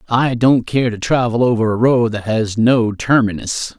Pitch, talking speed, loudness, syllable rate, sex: 115 Hz, 190 wpm, -16 LUFS, 4.5 syllables/s, male